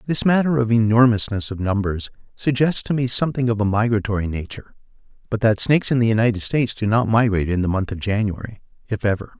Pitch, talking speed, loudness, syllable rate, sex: 110 Hz, 190 wpm, -20 LUFS, 6.5 syllables/s, male